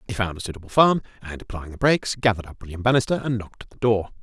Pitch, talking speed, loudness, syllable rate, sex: 105 Hz, 255 wpm, -23 LUFS, 7.5 syllables/s, male